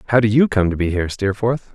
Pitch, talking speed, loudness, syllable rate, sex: 110 Hz, 275 wpm, -18 LUFS, 6.6 syllables/s, male